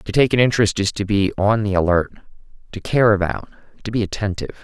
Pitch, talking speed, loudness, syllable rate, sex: 100 Hz, 205 wpm, -19 LUFS, 5.8 syllables/s, male